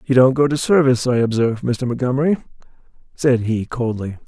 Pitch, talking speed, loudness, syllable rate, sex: 125 Hz, 170 wpm, -18 LUFS, 5.9 syllables/s, male